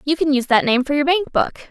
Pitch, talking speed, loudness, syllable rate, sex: 285 Hz, 315 wpm, -17 LUFS, 7.0 syllables/s, female